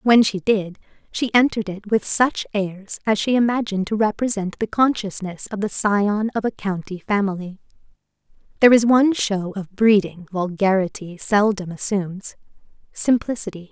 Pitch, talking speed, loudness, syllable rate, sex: 205 Hz, 140 wpm, -20 LUFS, 5.0 syllables/s, female